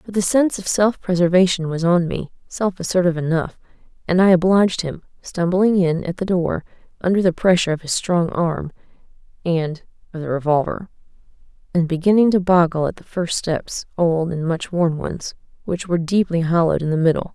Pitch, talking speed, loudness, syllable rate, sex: 175 Hz, 175 wpm, -19 LUFS, 5.5 syllables/s, female